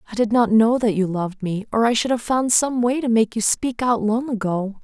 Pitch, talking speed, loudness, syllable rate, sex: 225 Hz, 275 wpm, -20 LUFS, 5.3 syllables/s, female